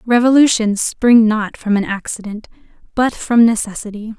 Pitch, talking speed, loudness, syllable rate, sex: 225 Hz, 130 wpm, -15 LUFS, 4.7 syllables/s, female